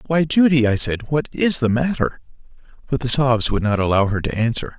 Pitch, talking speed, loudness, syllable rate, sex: 130 Hz, 215 wpm, -19 LUFS, 5.4 syllables/s, male